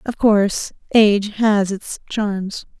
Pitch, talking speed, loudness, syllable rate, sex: 205 Hz, 130 wpm, -18 LUFS, 3.5 syllables/s, female